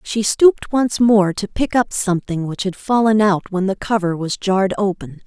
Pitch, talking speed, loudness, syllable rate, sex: 200 Hz, 205 wpm, -17 LUFS, 4.9 syllables/s, female